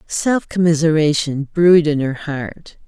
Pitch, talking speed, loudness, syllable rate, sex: 155 Hz, 125 wpm, -16 LUFS, 4.1 syllables/s, female